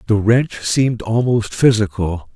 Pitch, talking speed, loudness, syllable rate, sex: 110 Hz, 125 wpm, -17 LUFS, 4.2 syllables/s, male